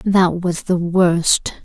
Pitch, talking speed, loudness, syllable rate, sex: 175 Hz, 145 wpm, -17 LUFS, 2.7 syllables/s, female